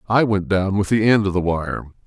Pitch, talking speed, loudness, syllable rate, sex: 100 Hz, 260 wpm, -19 LUFS, 5.1 syllables/s, male